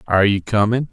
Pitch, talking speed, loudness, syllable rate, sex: 110 Hz, 195 wpm, -17 LUFS, 6.5 syllables/s, male